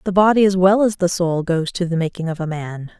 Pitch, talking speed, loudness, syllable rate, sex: 180 Hz, 280 wpm, -18 LUFS, 5.7 syllables/s, female